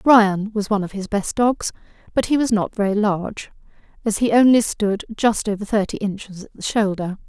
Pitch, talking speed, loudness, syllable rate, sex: 210 Hz, 200 wpm, -20 LUFS, 5.3 syllables/s, female